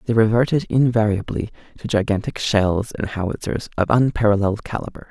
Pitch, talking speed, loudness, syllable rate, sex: 110 Hz, 130 wpm, -20 LUFS, 5.7 syllables/s, male